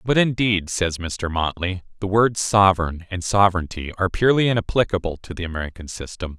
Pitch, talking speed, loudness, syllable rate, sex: 95 Hz, 160 wpm, -21 LUFS, 5.8 syllables/s, male